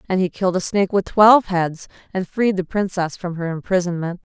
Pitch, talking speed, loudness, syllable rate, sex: 185 Hz, 210 wpm, -19 LUFS, 5.7 syllables/s, female